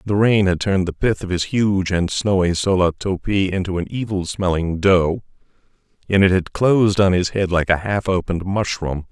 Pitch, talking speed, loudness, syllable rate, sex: 95 Hz, 200 wpm, -19 LUFS, 5.1 syllables/s, male